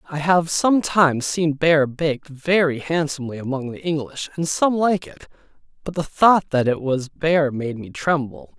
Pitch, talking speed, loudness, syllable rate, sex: 155 Hz, 175 wpm, -20 LUFS, 4.7 syllables/s, male